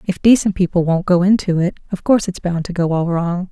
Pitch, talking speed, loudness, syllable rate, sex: 180 Hz, 255 wpm, -17 LUFS, 5.9 syllables/s, female